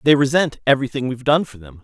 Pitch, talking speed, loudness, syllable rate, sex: 130 Hz, 230 wpm, -18 LUFS, 7.1 syllables/s, male